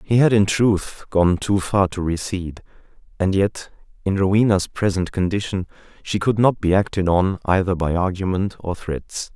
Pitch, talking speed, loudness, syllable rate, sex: 95 Hz, 165 wpm, -20 LUFS, 4.7 syllables/s, male